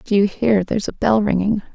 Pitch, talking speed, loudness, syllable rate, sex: 205 Hz, 240 wpm, -18 LUFS, 5.8 syllables/s, female